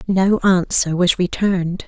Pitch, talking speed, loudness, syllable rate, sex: 185 Hz, 130 wpm, -17 LUFS, 4.1 syllables/s, female